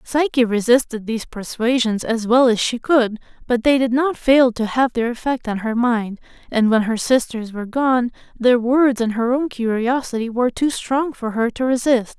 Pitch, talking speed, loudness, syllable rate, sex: 240 Hz, 195 wpm, -18 LUFS, 4.8 syllables/s, female